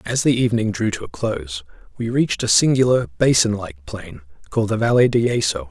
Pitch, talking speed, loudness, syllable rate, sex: 120 Hz, 200 wpm, -19 LUFS, 5.9 syllables/s, male